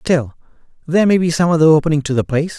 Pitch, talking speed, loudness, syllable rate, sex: 160 Hz, 230 wpm, -15 LUFS, 7.5 syllables/s, male